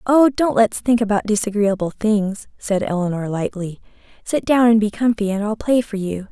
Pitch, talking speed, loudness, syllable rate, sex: 215 Hz, 190 wpm, -19 LUFS, 5.0 syllables/s, female